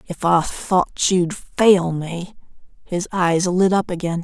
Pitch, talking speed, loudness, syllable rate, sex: 180 Hz, 155 wpm, -19 LUFS, 3.6 syllables/s, female